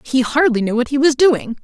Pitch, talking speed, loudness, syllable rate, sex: 265 Hz, 260 wpm, -15 LUFS, 5.3 syllables/s, female